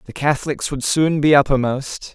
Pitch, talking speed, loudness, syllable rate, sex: 140 Hz, 170 wpm, -18 LUFS, 5.0 syllables/s, male